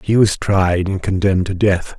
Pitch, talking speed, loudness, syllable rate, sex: 95 Hz, 210 wpm, -16 LUFS, 4.8 syllables/s, male